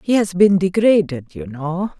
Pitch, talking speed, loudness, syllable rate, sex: 175 Hz, 180 wpm, -17 LUFS, 4.4 syllables/s, female